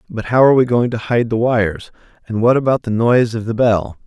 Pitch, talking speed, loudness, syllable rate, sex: 115 Hz, 250 wpm, -15 LUFS, 6.0 syllables/s, male